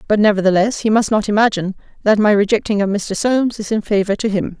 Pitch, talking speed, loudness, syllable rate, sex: 210 Hz, 220 wpm, -16 LUFS, 6.5 syllables/s, female